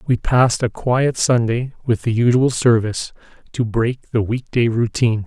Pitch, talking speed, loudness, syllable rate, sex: 120 Hz, 170 wpm, -18 LUFS, 5.0 syllables/s, male